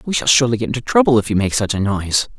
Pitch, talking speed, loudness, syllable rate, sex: 120 Hz, 300 wpm, -16 LUFS, 7.6 syllables/s, male